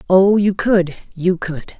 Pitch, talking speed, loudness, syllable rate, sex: 185 Hz, 135 wpm, -17 LUFS, 3.5 syllables/s, female